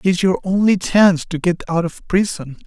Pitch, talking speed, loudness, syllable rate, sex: 180 Hz, 225 wpm, -17 LUFS, 5.3 syllables/s, male